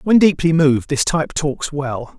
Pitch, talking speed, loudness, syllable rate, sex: 150 Hz, 190 wpm, -17 LUFS, 4.8 syllables/s, male